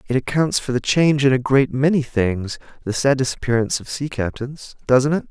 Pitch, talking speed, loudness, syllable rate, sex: 130 Hz, 180 wpm, -19 LUFS, 5.4 syllables/s, male